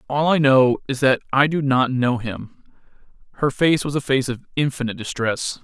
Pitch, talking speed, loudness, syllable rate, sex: 135 Hz, 190 wpm, -20 LUFS, 5.1 syllables/s, male